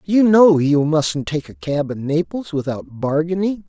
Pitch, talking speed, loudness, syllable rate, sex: 160 Hz, 180 wpm, -18 LUFS, 4.2 syllables/s, male